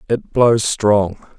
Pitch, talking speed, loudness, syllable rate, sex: 110 Hz, 130 wpm, -16 LUFS, 2.7 syllables/s, male